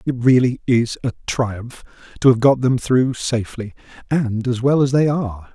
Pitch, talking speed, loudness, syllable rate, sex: 125 Hz, 185 wpm, -18 LUFS, 4.7 syllables/s, male